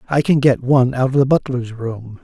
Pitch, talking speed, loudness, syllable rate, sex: 130 Hz, 240 wpm, -17 LUFS, 5.4 syllables/s, male